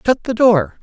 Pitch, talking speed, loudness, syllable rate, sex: 200 Hz, 215 wpm, -14 LUFS, 4.4 syllables/s, male